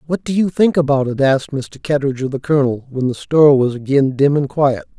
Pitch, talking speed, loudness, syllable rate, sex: 140 Hz, 240 wpm, -16 LUFS, 6.0 syllables/s, male